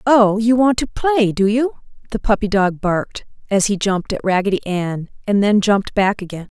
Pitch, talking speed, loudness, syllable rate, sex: 205 Hz, 200 wpm, -17 LUFS, 5.1 syllables/s, female